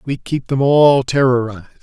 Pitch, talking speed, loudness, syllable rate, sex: 130 Hz, 165 wpm, -15 LUFS, 5.2 syllables/s, male